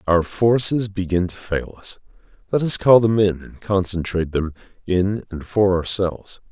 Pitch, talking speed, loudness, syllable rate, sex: 95 Hz, 165 wpm, -20 LUFS, 4.7 syllables/s, male